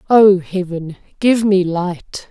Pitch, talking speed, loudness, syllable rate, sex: 190 Hz, 130 wpm, -15 LUFS, 3.2 syllables/s, female